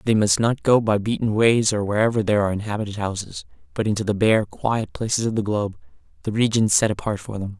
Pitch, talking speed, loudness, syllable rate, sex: 105 Hz, 215 wpm, -21 LUFS, 6.3 syllables/s, male